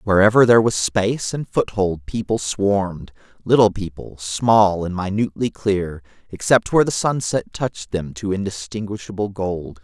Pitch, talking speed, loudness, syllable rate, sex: 100 Hz, 140 wpm, -20 LUFS, 4.9 syllables/s, male